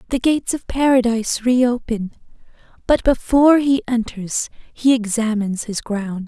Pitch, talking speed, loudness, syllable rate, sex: 235 Hz, 125 wpm, -18 LUFS, 4.7 syllables/s, female